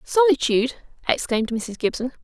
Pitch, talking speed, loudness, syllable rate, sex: 270 Hz, 105 wpm, -22 LUFS, 5.9 syllables/s, female